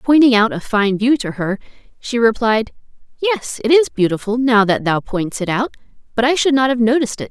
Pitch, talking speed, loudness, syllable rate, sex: 235 Hz, 215 wpm, -16 LUFS, 5.5 syllables/s, female